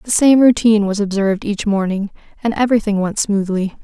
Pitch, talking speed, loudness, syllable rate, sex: 210 Hz, 170 wpm, -16 LUFS, 5.9 syllables/s, female